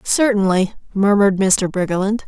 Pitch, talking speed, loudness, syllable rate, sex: 200 Hz, 105 wpm, -17 LUFS, 5.0 syllables/s, female